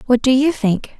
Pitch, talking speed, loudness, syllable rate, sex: 255 Hz, 240 wpm, -16 LUFS, 4.9 syllables/s, female